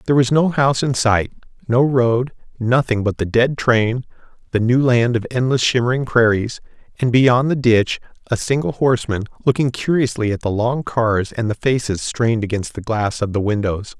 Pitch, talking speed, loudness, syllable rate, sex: 120 Hz, 185 wpm, -18 LUFS, 5.1 syllables/s, male